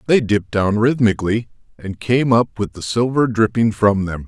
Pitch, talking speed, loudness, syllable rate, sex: 110 Hz, 180 wpm, -17 LUFS, 5.0 syllables/s, male